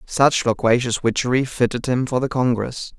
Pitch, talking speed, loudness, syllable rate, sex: 125 Hz, 160 wpm, -20 LUFS, 4.9 syllables/s, male